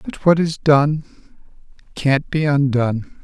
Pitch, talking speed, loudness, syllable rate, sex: 145 Hz, 130 wpm, -18 LUFS, 4.2 syllables/s, male